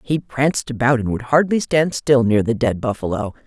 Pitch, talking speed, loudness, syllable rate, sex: 125 Hz, 210 wpm, -18 LUFS, 5.2 syllables/s, female